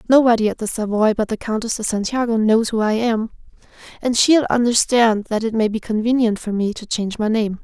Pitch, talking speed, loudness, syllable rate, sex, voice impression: 225 Hz, 210 wpm, -18 LUFS, 5.7 syllables/s, female, very feminine, young, very thin, tensed, slightly weak, slightly bright, soft, slightly muffled, fluent, slightly raspy, very cute, intellectual, refreshing, sincere, very calm, very friendly, very reassuring, unique, elegant, slightly wild, very sweet, lively, very kind, slightly sharp, modest, very light